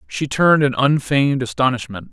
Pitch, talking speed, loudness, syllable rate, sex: 135 Hz, 140 wpm, -17 LUFS, 5.7 syllables/s, male